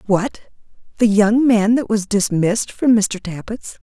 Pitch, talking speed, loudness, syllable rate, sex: 215 Hz, 155 wpm, -17 LUFS, 4.3 syllables/s, female